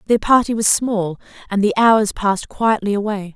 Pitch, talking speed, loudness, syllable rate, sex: 210 Hz, 180 wpm, -17 LUFS, 5.0 syllables/s, female